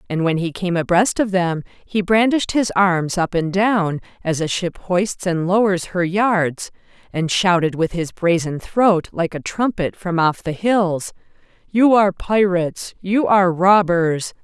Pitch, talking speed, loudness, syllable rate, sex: 185 Hz, 170 wpm, -18 LUFS, 4.1 syllables/s, female